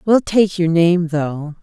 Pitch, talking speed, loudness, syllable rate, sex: 175 Hz, 185 wpm, -16 LUFS, 3.4 syllables/s, female